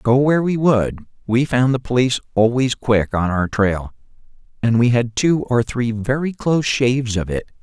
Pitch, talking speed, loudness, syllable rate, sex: 120 Hz, 190 wpm, -18 LUFS, 4.9 syllables/s, male